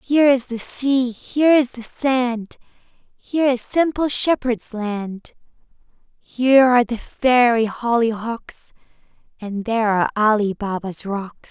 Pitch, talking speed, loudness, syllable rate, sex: 240 Hz, 125 wpm, -19 LUFS, 4.1 syllables/s, female